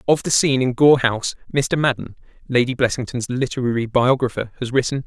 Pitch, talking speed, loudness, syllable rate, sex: 125 Hz, 165 wpm, -19 LUFS, 6.0 syllables/s, male